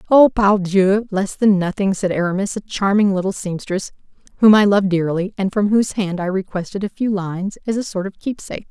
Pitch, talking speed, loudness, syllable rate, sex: 195 Hz, 200 wpm, -18 LUFS, 5.5 syllables/s, female